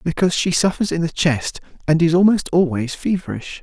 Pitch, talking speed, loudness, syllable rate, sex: 165 Hz, 180 wpm, -18 LUFS, 5.6 syllables/s, male